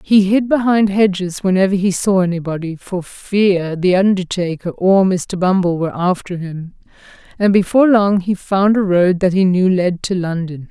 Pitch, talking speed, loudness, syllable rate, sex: 185 Hz, 175 wpm, -15 LUFS, 4.7 syllables/s, female